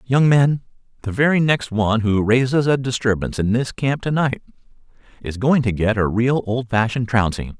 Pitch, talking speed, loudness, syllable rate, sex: 120 Hz, 180 wpm, -19 LUFS, 5.3 syllables/s, male